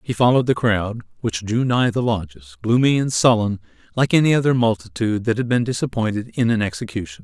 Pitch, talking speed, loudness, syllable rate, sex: 115 Hz, 190 wpm, -19 LUFS, 6.0 syllables/s, male